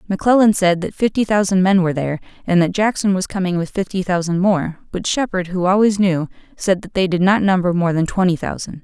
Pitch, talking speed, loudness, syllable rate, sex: 185 Hz, 215 wpm, -17 LUFS, 6.0 syllables/s, female